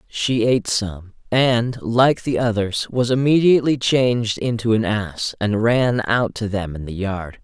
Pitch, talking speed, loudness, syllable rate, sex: 115 Hz, 170 wpm, -19 LUFS, 4.2 syllables/s, male